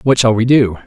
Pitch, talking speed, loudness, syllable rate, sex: 115 Hz, 275 wpm, -12 LUFS, 5.6 syllables/s, male